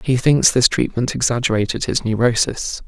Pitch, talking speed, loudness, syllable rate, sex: 120 Hz, 145 wpm, -17 LUFS, 5.1 syllables/s, male